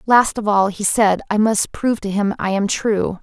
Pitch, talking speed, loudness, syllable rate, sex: 205 Hz, 240 wpm, -18 LUFS, 4.7 syllables/s, female